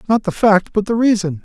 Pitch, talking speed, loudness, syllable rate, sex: 205 Hz, 250 wpm, -15 LUFS, 5.6 syllables/s, male